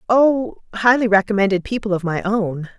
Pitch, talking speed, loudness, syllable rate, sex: 210 Hz, 150 wpm, -18 LUFS, 5.2 syllables/s, female